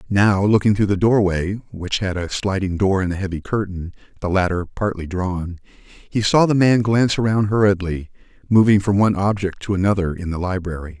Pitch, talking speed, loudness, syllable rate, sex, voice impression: 95 Hz, 185 wpm, -19 LUFS, 5.3 syllables/s, male, very masculine, slightly middle-aged, thick, cool, calm, slightly elegant, slightly sweet